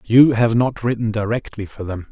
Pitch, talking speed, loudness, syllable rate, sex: 115 Hz, 200 wpm, -18 LUFS, 5.0 syllables/s, male